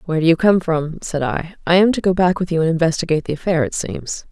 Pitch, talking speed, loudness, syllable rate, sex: 170 Hz, 280 wpm, -18 LUFS, 6.5 syllables/s, female